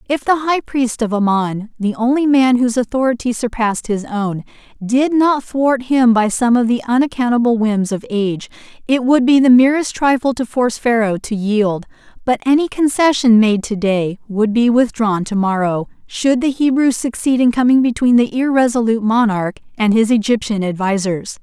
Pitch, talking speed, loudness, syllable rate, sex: 235 Hz, 170 wpm, -15 LUFS, 5.0 syllables/s, female